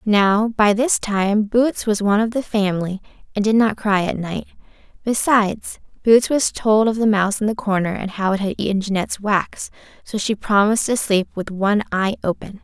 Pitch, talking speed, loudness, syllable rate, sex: 210 Hz, 200 wpm, -19 LUFS, 5.2 syllables/s, female